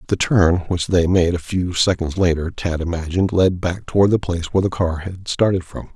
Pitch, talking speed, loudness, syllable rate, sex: 90 Hz, 220 wpm, -19 LUFS, 5.4 syllables/s, male